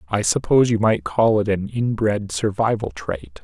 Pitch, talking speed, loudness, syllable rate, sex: 100 Hz, 175 wpm, -20 LUFS, 4.6 syllables/s, male